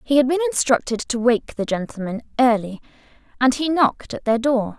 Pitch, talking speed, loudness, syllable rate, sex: 250 Hz, 190 wpm, -20 LUFS, 5.5 syllables/s, female